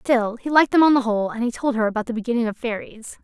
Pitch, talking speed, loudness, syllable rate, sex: 235 Hz, 295 wpm, -20 LUFS, 7.0 syllables/s, female